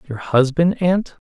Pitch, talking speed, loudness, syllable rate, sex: 155 Hz, 140 wpm, -18 LUFS, 3.8 syllables/s, male